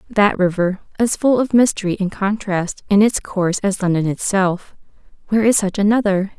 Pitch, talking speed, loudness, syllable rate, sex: 200 Hz, 160 wpm, -17 LUFS, 5.2 syllables/s, female